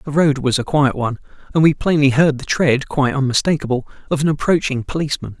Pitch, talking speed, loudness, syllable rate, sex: 140 Hz, 180 wpm, -17 LUFS, 6.4 syllables/s, male